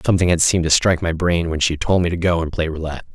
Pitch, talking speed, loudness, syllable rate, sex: 85 Hz, 305 wpm, -18 LUFS, 7.5 syllables/s, male